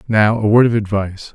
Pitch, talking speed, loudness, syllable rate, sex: 105 Hz, 225 wpm, -15 LUFS, 5.8 syllables/s, male